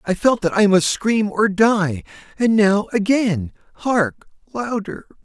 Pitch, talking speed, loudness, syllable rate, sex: 200 Hz, 125 wpm, -18 LUFS, 3.8 syllables/s, male